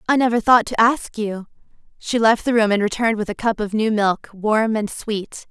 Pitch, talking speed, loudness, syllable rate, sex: 220 Hz, 230 wpm, -19 LUFS, 5.1 syllables/s, female